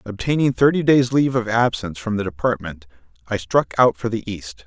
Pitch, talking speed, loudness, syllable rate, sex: 110 Hz, 195 wpm, -19 LUFS, 5.6 syllables/s, male